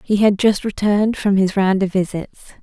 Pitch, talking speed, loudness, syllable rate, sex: 200 Hz, 205 wpm, -17 LUFS, 5.4 syllables/s, female